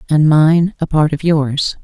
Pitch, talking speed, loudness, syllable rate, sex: 155 Hz, 195 wpm, -14 LUFS, 3.8 syllables/s, female